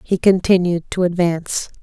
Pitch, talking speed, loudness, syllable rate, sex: 180 Hz, 130 wpm, -17 LUFS, 4.9 syllables/s, female